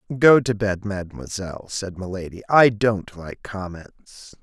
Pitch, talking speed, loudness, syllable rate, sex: 100 Hz, 135 wpm, -21 LUFS, 4.4 syllables/s, male